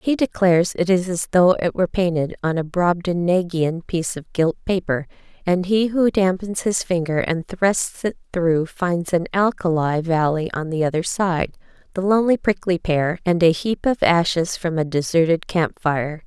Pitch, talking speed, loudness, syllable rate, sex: 175 Hz, 175 wpm, -20 LUFS, 4.6 syllables/s, female